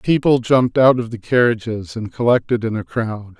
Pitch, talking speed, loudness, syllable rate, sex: 115 Hz, 195 wpm, -17 LUFS, 5.2 syllables/s, male